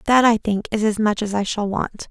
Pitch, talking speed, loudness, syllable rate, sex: 215 Hz, 285 wpm, -20 LUFS, 5.2 syllables/s, female